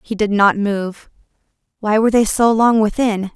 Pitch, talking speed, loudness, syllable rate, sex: 215 Hz, 180 wpm, -16 LUFS, 4.7 syllables/s, female